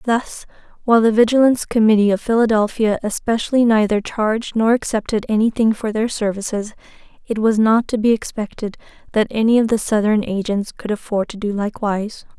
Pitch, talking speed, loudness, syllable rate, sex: 220 Hz, 160 wpm, -18 LUFS, 5.7 syllables/s, female